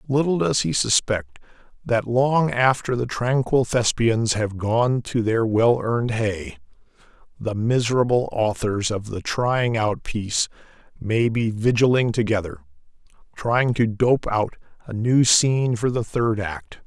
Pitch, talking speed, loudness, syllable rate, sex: 115 Hz, 140 wpm, -21 LUFS, 4.0 syllables/s, male